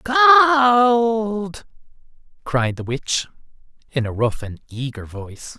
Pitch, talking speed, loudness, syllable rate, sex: 185 Hz, 105 wpm, -18 LUFS, 5.4 syllables/s, male